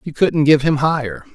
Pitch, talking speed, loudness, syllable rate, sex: 145 Hz, 225 wpm, -16 LUFS, 5.1 syllables/s, male